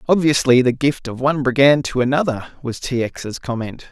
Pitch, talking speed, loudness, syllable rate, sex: 130 Hz, 185 wpm, -18 LUFS, 5.4 syllables/s, male